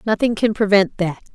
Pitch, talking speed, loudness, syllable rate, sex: 200 Hz, 180 wpm, -18 LUFS, 5.3 syllables/s, female